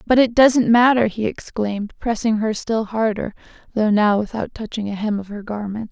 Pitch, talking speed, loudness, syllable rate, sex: 220 Hz, 195 wpm, -19 LUFS, 5.0 syllables/s, female